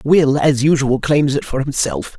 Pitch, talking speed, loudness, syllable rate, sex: 135 Hz, 195 wpm, -16 LUFS, 4.3 syllables/s, male